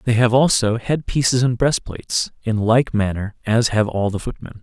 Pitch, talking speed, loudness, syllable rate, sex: 115 Hz, 195 wpm, -19 LUFS, 4.9 syllables/s, male